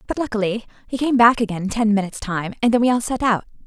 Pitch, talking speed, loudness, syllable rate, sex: 220 Hz, 260 wpm, -19 LUFS, 6.9 syllables/s, female